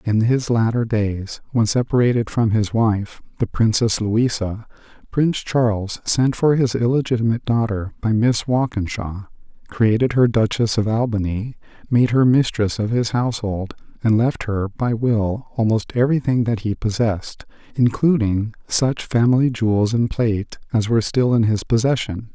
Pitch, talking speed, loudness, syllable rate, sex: 115 Hz, 150 wpm, -19 LUFS, 4.7 syllables/s, male